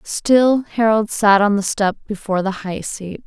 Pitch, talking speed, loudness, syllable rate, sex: 210 Hz, 185 wpm, -17 LUFS, 4.4 syllables/s, female